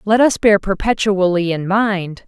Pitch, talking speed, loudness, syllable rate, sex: 200 Hz, 160 wpm, -16 LUFS, 4.2 syllables/s, female